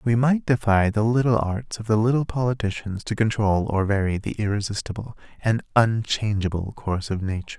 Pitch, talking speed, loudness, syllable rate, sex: 110 Hz, 165 wpm, -23 LUFS, 5.5 syllables/s, male